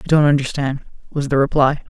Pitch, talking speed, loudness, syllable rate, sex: 140 Hz, 180 wpm, -18 LUFS, 6.3 syllables/s, male